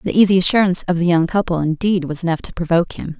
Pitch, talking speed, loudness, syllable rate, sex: 175 Hz, 245 wpm, -17 LUFS, 7.2 syllables/s, female